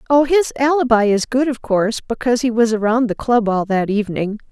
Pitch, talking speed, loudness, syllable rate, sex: 235 Hz, 215 wpm, -17 LUFS, 5.8 syllables/s, female